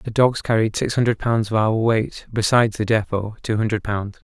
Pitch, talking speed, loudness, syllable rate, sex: 110 Hz, 210 wpm, -20 LUFS, 4.9 syllables/s, male